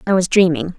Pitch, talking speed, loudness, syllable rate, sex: 180 Hz, 230 wpm, -15 LUFS, 6.2 syllables/s, female